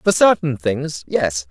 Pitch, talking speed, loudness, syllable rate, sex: 135 Hz, 160 wpm, -18 LUFS, 3.5 syllables/s, male